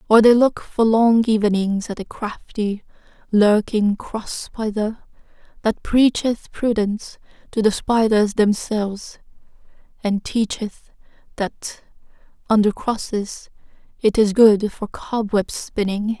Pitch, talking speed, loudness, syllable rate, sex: 215 Hz, 110 wpm, -19 LUFS, 3.8 syllables/s, female